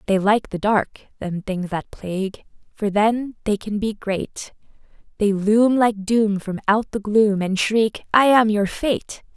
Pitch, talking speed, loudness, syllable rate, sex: 210 Hz, 180 wpm, -20 LUFS, 3.8 syllables/s, female